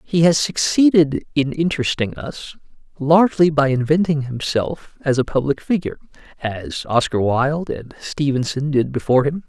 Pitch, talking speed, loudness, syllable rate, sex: 145 Hz, 140 wpm, -19 LUFS, 5.0 syllables/s, male